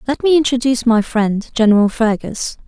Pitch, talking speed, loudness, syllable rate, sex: 235 Hz, 155 wpm, -15 LUFS, 5.4 syllables/s, female